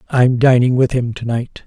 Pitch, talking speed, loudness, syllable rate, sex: 125 Hz, 215 wpm, -15 LUFS, 4.6 syllables/s, male